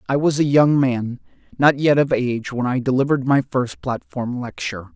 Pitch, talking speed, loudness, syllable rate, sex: 130 Hz, 195 wpm, -19 LUFS, 5.3 syllables/s, male